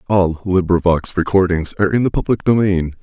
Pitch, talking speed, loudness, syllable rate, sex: 90 Hz, 160 wpm, -16 LUFS, 5.3 syllables/s, male